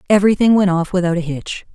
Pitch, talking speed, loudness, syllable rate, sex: 185 Hz, 205 wpm, -16 LUFS, 6.6 syllables/s, female